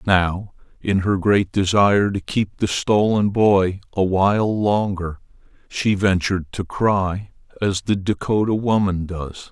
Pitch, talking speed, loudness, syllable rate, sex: 100 Hz, 130 wpm, -20 LUFS, 3.9 syllables/s, male